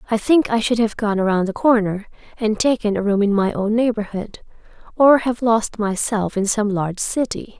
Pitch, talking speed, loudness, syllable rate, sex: 215 Hz, 195 wpm, -19 LUFS, 5.0 syllables/s, female